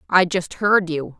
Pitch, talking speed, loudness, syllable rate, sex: 175 Hz, 200 wpm, -19 LUFS, 4.0 syllables/s, female